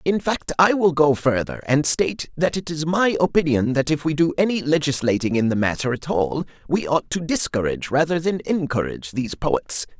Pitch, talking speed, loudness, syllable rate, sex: 150 Hz, 200 wpm, -21 LUFS, 5.4 syllables/s, male